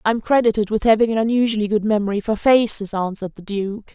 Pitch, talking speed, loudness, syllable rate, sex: 215 Hz, 200 wpm, -19 LUFS, 6.2 syllables/s, female